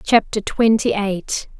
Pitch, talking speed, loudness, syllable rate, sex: 215 Hz, 115 wpm, -19 LUFS, 3.6 syllables/s, female